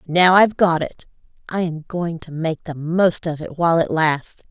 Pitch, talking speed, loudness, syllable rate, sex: 165 Hz, 225 wpm, -19 LUFS, 4.8 syllables/s, female